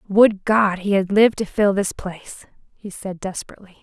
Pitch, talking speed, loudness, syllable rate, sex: 195 Hz, 190 wpm, -19 LUFS, 5.1 syllables/s, female